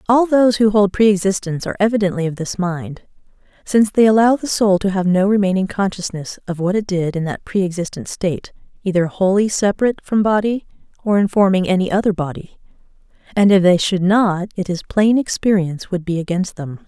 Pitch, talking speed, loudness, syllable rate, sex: 195 Hz, 190 wpm, -17 LUFS, 5.9 syllables/s, female